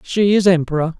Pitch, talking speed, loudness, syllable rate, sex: 175 Hz, 180 wpm, -15 LUFS, 5.6 syllables/s, male